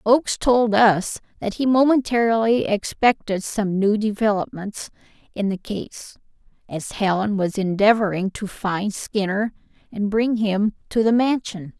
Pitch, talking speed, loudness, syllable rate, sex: 210 Hz, 130 wpm, -21 LUFS, 4.2 syllables/s, female